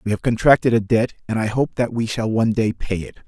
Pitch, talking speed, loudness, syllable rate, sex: 115 Hz, 275 wpm, -20 LUFS, 6.1 syllables/s, male